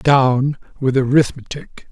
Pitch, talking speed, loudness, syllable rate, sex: 135 Hz, 95 wpm, -17 LUFS, 3.7 syllables/s, male